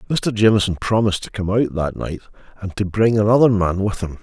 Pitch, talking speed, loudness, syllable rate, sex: 100 Hz, 215 wpm, -18 LUFS, 5.9 syllables/s, male